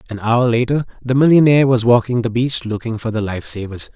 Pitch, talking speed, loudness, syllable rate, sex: 120 Hz, 210 wpm, -16 LUFS, 5.9 syllables/s, male